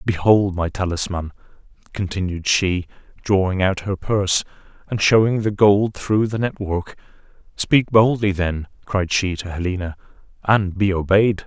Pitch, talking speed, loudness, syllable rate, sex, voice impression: 95 Hz, 140 wpm, -19 LUFS, 4.4 syllables/s, male, very masculine, very adult-like, very thick, tensed, very powerful, slightly bright, hard, muffled, slightly halting, very cool, very intellectual, sincere, calm, very mature, very friendly, very reassuring, unique, slightly elegant, very wild, slightly sweet, slightly lively, kind